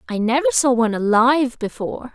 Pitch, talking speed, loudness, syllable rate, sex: 245 Hz, 170 wpm, -18 LUFS, 6.3 syllables/s, female